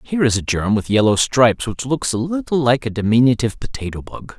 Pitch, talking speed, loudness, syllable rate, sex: 120 Hz, 220 wpm, -18 LUFS, 6.1 syllables/s, male